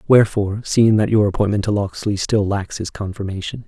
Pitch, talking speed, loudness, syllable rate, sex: 100 Hz, 180 wpm, -19 LUFS, 5.8 syllables/s, male